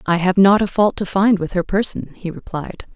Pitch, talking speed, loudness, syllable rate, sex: 190 Hz, 245 wpm, -17 LUFS, 5.1 syllables/s, female